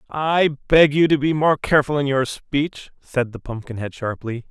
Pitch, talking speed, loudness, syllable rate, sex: 140 Hz, 185 wpm, -20 LUFS, 4.7 syllables/s, male